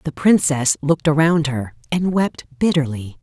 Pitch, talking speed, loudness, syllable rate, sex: 150 Hz, 150 wpm, -18 LUFS, 4.7 syllables/s, female